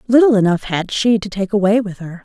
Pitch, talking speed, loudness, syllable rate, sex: 205 Hz, 240 wpm, -16 LUFS, 5.8 syllables/s, female